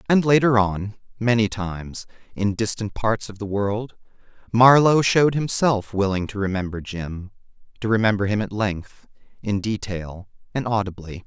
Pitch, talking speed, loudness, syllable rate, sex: 105 Hz, 145 wpm, -21 LUFS, 4.7 syllables/s, male